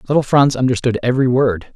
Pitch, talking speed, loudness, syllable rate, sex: 125 Hz, 170 wpm, -15 LUFS, 6.5 syllables/s, male